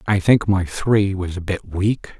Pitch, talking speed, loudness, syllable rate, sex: 95 Hz, 220 wpm, -19 LUFS, 4.1 syllables/s, male